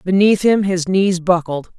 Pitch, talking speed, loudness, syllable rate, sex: 185 Hz, 170 wpm, -15 LUFS, 4.2 syllables/s, female